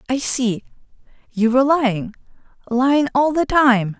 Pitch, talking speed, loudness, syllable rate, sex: 250 Hz, 135 wpm, -17 LUFS, 4.7 syllables/s, female